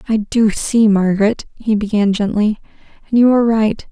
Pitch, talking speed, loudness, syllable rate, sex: 215 Hz, 170 wpm, -15 LUFS, 5.1 syllables/s, female